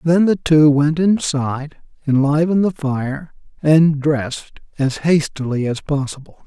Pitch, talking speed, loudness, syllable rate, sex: 150 Hz, 130 wpm, -17 LUFS, 4.3 syllables/s, male